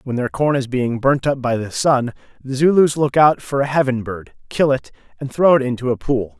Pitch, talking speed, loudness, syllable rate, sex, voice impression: 130 Hz, 245 wpm, -17 LUFS, 5.2 syllables/s, male, masculine, adult-like, slightly thick, cool, slightly intellectual, friendly